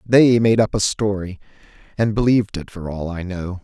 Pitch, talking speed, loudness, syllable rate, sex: 100 Hz, 200 wpm, -19 LUFS, 5.1 syllables/s, male